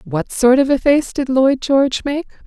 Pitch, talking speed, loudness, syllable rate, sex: 265 Hz, 220 wpm, -16 LUFS, 4.4 syllables/s, female